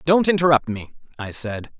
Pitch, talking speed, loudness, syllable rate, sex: 140 Hz, 170 wpm, -20 LUFS, 5.1 syllables/s, male